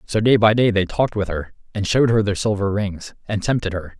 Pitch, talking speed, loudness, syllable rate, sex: 105 Hz, 255 wpm, -19 LUFS, 5.9 syllables/s, male